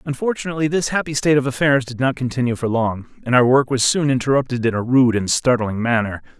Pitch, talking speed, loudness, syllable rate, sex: 130 Hz, 215 wpm, -18 LUFS, 6.4 syllables/s, male